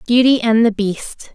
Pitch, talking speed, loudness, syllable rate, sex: 230 Hz, 180 wpm, -15 LUFS, 4.2 syllables/s, female